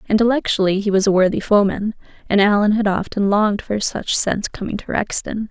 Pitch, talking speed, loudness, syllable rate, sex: 205 Hz, 185 wpm, -18 LUFS, 5.8 syllables/s, female